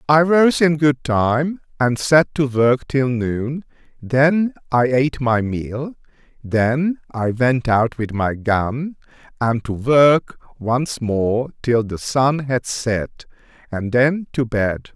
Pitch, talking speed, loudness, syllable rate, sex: 130 Hz, 150 wpm, -18 LUFS, 3.1 syllables/s, male